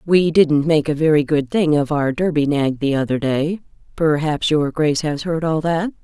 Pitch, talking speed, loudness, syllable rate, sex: 155 Hz, 210 wpm, -18 LUFS, 4.7 syllables/s, female